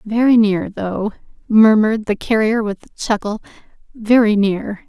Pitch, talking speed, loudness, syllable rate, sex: 215 Hz, 135 wpm, -16 LUFS, 4.5 syllables/s, female